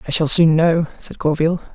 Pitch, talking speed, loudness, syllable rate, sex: 160 Hz, 205 wpm, -16 LUFS, 5.8 syllables/s, female